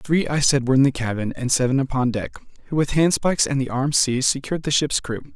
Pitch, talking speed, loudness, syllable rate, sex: 135 Hz, 245 wpm, -21 LUFS, 6.5 syllables/s, male